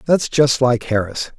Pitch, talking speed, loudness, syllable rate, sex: 130 Hz, 175 wpm, -17 LUFS, 4.2 syllables/s, male